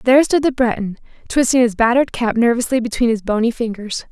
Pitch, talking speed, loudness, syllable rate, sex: 235 Hz, 190 wpm, -17 LUFS, 6.2 syllables/s, female